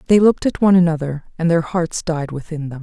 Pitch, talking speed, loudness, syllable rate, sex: 165 Hz, 235 wpm, -18 LUFS, 6.4 syllables/s, female